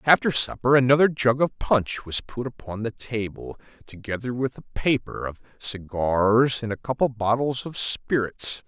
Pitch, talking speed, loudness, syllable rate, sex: 120 Hz, 165 wpm, -24 LUFS, 4.6 syllables/s, male